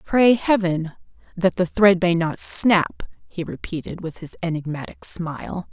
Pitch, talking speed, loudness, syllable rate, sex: 180 Hz, 145 wpm, -21 LUFS, 4.2 syllables/s, female